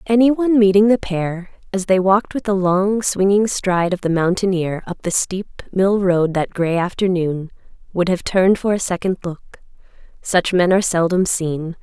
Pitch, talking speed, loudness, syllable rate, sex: 190 Hz, 180 wpm, -18 LUFS, 4.8 syllables/s, female